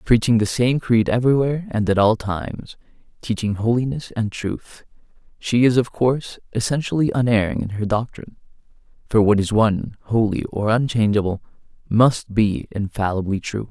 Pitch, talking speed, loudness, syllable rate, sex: 115 Hz, 145 wpm, -20 LUFS, 5.2 syllables/s, male